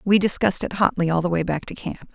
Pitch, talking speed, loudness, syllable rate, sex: 185 Hz, 280 wpm, -22 LUFS, 6.4 syllables/s, female